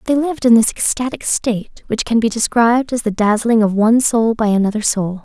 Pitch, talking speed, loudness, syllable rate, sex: 230 Hz, 220 wpm, -15 LUFS, 5.8 syllables/s, female